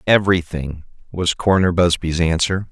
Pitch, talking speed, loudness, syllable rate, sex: 85 Hz, 110 wpm, -18 LUFS, 5.2 syllables/s, male